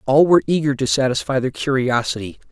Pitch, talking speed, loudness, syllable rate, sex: 135 Hz, 165 wpm, -18 LUFS, 6.3 syllables/s, male